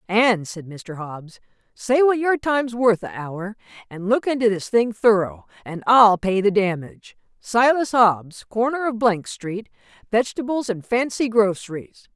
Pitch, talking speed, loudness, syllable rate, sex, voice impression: 215 Hz, 155 wpm, -20 LUFS, 4.3 syllables/s, female, feminine, middle-aged, tensed, powerful, hard, clear, intellectual, calm, elegant, lively, strict, sharp